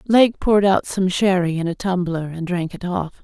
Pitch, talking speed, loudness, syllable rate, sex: 185 Hz, 225 wpm, -19 LUFS, 4.9 syllables/s, female